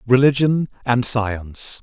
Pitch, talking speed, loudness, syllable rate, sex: 120 Hz, 100 wpm, -19 LUFS, 4.0 syllables/s, male